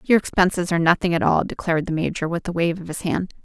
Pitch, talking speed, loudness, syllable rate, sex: 175 Hz, 260 wpm, -21 LUFS, 6.8 syllables/s, female